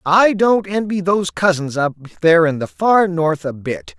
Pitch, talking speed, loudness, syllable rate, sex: 170 Hz, 195 wpm, -16 LUFS, 4.7 syllables/s, male